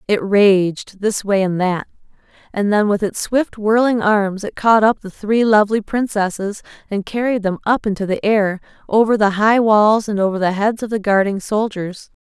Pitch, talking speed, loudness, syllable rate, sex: 205 Hz, 190 wpm, -17 LUFS, 4.7 syllables/s, female